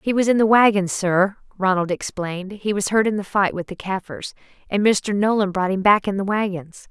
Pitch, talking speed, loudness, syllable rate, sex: 200 Hz, 225 wpm, -20 LUFS, 5.2 syllables/s, female